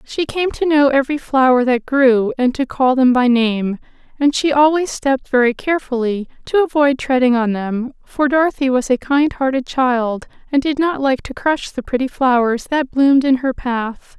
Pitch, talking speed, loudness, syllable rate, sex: 270 Hz, 195 wpm, -16 LUFS, 4.8 syllables/s, female